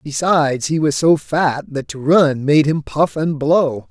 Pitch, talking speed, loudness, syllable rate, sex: 145 Hz, 200 wpm, -16 LUFS, 3.9 syllables/s, male